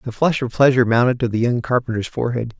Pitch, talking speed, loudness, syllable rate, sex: 120 Hz, 230 wpm, -18 LUFS, 6.9 syllables/s, male